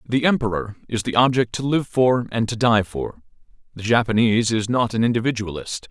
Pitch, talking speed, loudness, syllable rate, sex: 115 Hz, 185 wpm, -20 LUFS, 5.5 syllables/s, male